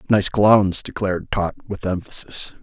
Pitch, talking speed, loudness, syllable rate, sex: 95 Hz, 135 wpm, -20 LUFS, 4.5 syllables/s, male